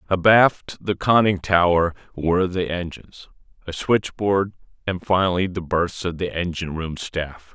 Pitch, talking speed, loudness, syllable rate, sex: 90 Hz, 145 wpm, -21 LUFS, 4.5 syllables/s, male